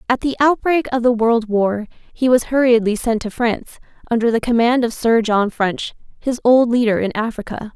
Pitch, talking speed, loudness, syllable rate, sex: 235 Hz, 195 wpm, -17 LUFS, 5.1 syllables/s, female